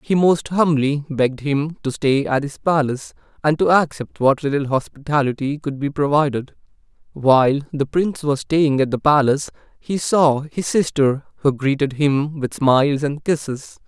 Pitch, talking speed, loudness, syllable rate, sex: 145 Hz, 165 wpm, -19 LUFS, 4.8 syllables/s, male